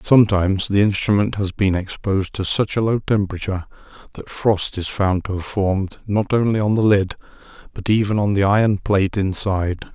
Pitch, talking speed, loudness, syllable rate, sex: 100 Hz, 180 wpm, -19 LUFS, 5.6 syllables/s, male